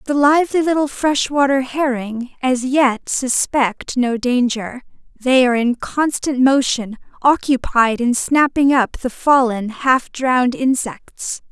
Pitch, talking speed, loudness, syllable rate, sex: 260 Hz, 125 wpm, -17 LUFS, 3.9 syllables/s, female